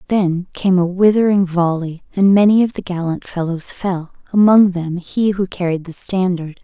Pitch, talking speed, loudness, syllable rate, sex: 185 Hz, 170 wpm, -16 LUFS, 4.6 syllables/s, female